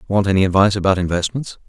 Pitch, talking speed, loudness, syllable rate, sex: 100 Hz, 180 wpm, -17 LUFS, 7.5 syllables/s, male